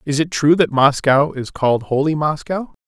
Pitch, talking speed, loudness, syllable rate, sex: 145 Hz, 190 wpm, -17 LUFS, 4.9 syllables/s, male